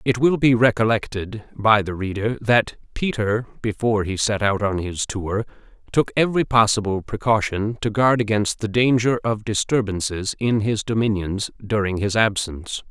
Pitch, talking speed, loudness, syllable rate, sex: 110 Hz, 155 wpm, -21 LUFS, 4.8 syllables/s, male